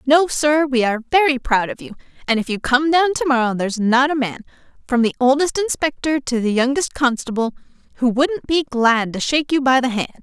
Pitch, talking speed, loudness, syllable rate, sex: 265 Hz, 215 wpm, -18 LUFS, 5.7 syllables/s, female